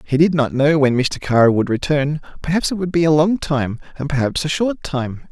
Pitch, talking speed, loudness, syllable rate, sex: 145 Hz, 235 wpm, -18 LUFS, 5.2 syllables/s, male